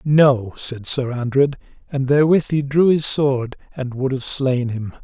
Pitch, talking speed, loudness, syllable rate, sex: 135 Hz, 180 wpm, -19 LUFS, 4.2 syllables/s, male